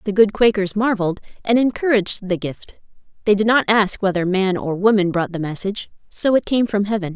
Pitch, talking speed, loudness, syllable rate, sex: 200 Hz, 200 wpm, -19 LUFS, 5.7 syllables/s, female